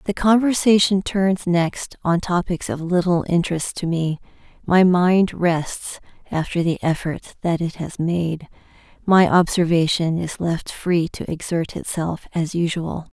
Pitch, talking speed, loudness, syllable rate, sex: 175 Hz, 140 wpm, -20 LUFS, 4.0 syllables/s, female